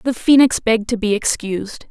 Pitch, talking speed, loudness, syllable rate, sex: 225 Hz, 190 wpm, -16 LUFS, 5.6 syllables/s, female